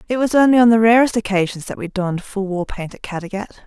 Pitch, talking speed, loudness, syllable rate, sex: 210 Hz, 245 wpm, -17 LUFS, 6.4 syllables/s, female